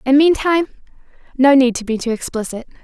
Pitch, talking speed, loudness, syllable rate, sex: 265 Hz, 150 wpm, -16 LUFS, 6.3 syllables/s, female